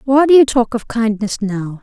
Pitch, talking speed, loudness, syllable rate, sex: 230 Hz, 230 wpm, -14 LUFS, 4.8 syllables/s, female